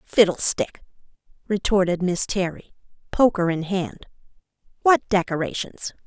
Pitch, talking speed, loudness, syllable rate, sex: 190 Hz, 90 wpm, -22 LUFS, 4.5 syllables/s, female